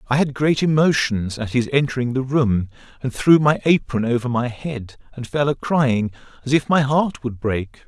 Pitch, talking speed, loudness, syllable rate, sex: 130 Hz, 200 wpm, -20 LUFS, 4.8 syllables/s, male